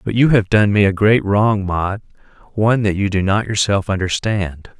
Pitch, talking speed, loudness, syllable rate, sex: 100 Hz, 200 wpm, -16 LUFS, 4.9 syllables/s, male